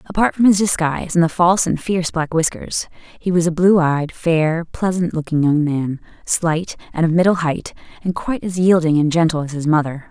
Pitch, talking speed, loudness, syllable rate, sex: 165 Hz, 210 wpm, -18 LUFS, 5.2 syllables/s, female